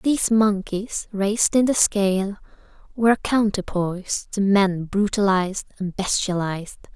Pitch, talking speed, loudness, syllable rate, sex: 200 Hz, 120 wpm, -21 LUFS, 4.7 syllables/s, female